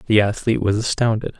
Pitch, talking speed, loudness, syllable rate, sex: 110 Hz, 175 wpm, -19 LUFS, 6.8 syllables/s, male